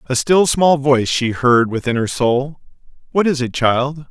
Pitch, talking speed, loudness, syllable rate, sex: 135 Hz, 190 wpm, -16 LUFS, 4.4 syllables/s, male